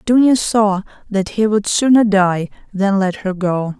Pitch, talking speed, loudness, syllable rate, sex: 205 Hz, 175 wpm, -16 LUFS, 4.0 syllables/s, female